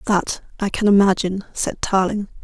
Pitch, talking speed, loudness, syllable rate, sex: 195 Hz, 150 wpm, -19 LUFS, 5.0 syllables/s, female